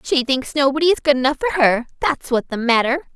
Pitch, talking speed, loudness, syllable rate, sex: 270 Hz, 250 wpm, -18 LUFS, 6.2 syllables/s, female